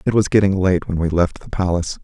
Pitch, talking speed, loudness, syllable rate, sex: 90 Hz, 265 wpm, -18 LUFS, 6.3 syllables/s, male